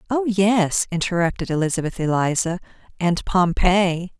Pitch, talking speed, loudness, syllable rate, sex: 180 Hz, 100 wpm, -20 LUFS, 4.6 syllables/s, female